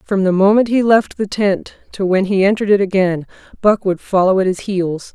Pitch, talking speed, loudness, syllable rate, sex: 195 Hz, 220 wpm, -15 LUFS, 5.3 syllables/s, female